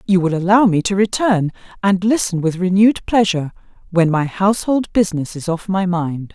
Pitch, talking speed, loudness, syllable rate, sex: 185 Hz, 180 wpm, -17 LUFS, 5.4 syllables/s, female